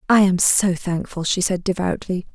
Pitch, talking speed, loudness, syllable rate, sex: 185 Hz, 180 wpm, -19 LUFS, 4.7 syllables/s, female